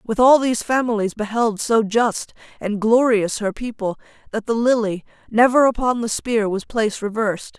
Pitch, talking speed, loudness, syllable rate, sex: 225 Hz, 165 wpm, -19 LUFS, 4.8 syllables/s, female